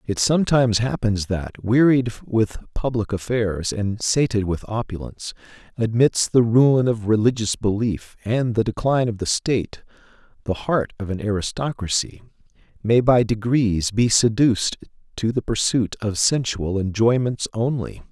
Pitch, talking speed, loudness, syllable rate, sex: 110 Hz, 135 wpm, -21 LUFS, 4.6 syllables/s, male